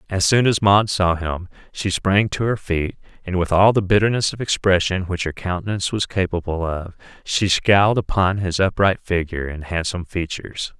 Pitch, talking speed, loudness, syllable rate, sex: 95 Hz, 185 wpm, -20 LUFS, 5.2 syllables/s, male